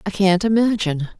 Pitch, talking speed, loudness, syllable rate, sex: 195 Hz, 150 wpm, -18 LUFS, 6.0 syllables/s, female